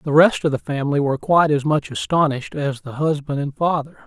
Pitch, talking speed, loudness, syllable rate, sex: 145 Hz, 220 wpm, -20 LUFS, 6.1 syllables/s, male